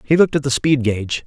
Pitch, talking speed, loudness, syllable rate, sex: 135 Hz, 285 wpm, -17 LUFS, 6.0 syllables/s, male